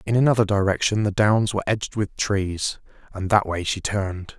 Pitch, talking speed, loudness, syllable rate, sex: 100 Hz, 190 wpm, -22 LUFS, 5.4 syllables/s, male